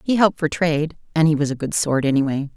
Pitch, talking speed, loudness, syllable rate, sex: 155 Hz, 260 wpm, -20 LUFS, 6.7 syllables/s, female